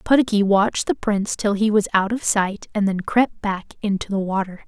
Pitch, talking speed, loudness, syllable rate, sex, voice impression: 205 Hz, 220 wpm, -20 LUFS, 5.2 syllables/s, female, feminine, slightly young, tensed, powerful, clear, fluent, slightly cute, calm, friendly, reassuring, lively, slightly sharp